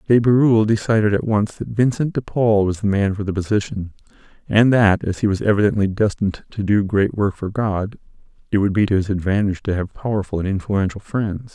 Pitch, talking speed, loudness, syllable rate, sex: 105 Hz, 210 wpm, -19 LUFS, 5.7 syllables/s, male